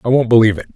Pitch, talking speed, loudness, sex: 115 Hz, 315 wpm, -13 LUFS, male